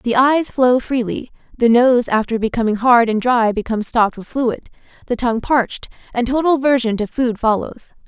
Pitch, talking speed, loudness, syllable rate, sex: 240 Hz, 180 wpm, -17 LUFS, 5.4 syllables/s, female